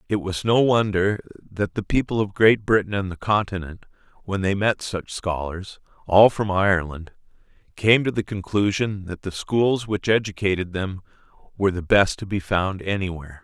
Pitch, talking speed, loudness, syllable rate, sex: 100 Hz, 170 wpm, -22 LUFS, 4.8 syllables/s, male